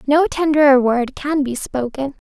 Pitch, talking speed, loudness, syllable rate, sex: 275 Hz, 160 wpm, -17 LUFS, 4.4 syllables/s, female